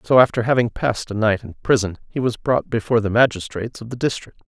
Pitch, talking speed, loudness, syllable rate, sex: 115 Hz, 230 wpm, -20 LUFS, 6.5 syllables/s, male